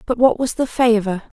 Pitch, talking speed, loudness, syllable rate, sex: 235 Hz, 215 wpm, -18 LUFS, 5.0 syllables/s, female